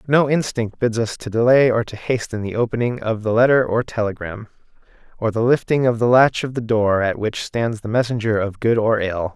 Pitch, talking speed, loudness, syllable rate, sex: 115 Hz, 220 wpm, -19 LUFS, 5.3 syllables/s, male